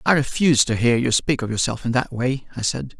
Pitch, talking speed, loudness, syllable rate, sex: 125 Hz, 260 wpm, -20 LUFS, 5.7 syllables/s, male